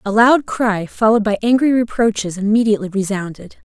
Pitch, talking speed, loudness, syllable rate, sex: 215 Hz, 145 wpm, -16 LUFS, 5.7 syllables/s, female